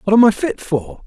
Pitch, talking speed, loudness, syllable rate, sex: 170 Hz, 280 wpm, -17 LUFS, 5.3 syllables/s, male